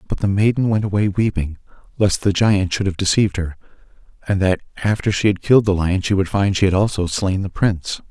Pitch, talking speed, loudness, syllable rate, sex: 95 Hz, 220 wpm, -18 LUFS, 6.0 syllables/s, male